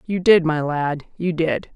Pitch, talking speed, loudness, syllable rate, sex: 165 Hz, 205 wpm, -20 LUFS, 4.0 syllables/s, female